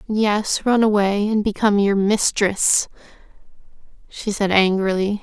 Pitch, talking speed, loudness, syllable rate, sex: 205 Hz, 115 wpm, -18 LUFS, 4.2 syllables/s, female